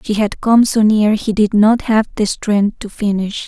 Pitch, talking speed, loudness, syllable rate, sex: 210 Hz, 225 wpm, -14 LUFS, 4.3 syllables/s, female